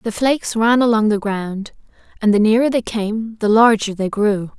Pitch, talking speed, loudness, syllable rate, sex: 215 Hz, 195 wpm, -17 LUFS, 4.7 syllables/s, female